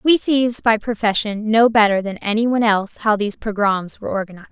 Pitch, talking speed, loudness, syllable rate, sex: 215 Hz, 200 wpm, -18 LUFS, 6.3 syllables/s, female